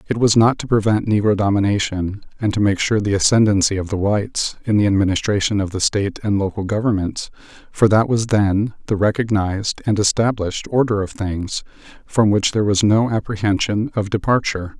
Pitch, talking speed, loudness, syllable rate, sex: 105 Hz, 180 wpm, -18 LUFS, 5.6 syllables/s, male